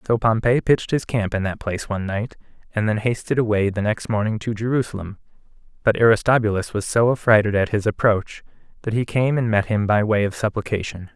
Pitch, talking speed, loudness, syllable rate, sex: 110 Hz, 200 wpm, -21 LUFS, 5.9 syllables/s, male